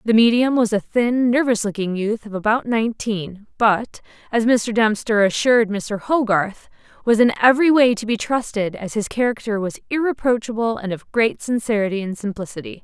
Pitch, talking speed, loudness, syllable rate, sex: 225 Hz, 170 wpm, -19 LUFS, 5.2 syllables/s, female